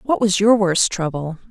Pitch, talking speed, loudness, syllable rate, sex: 200 Hz, 200 wpm, -17 LUFS, 4.6 syllables/s, female